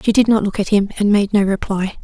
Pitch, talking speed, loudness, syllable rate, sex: 205 Hz, 295 wpm, -16 LUFS, 6.0 syllables/s, female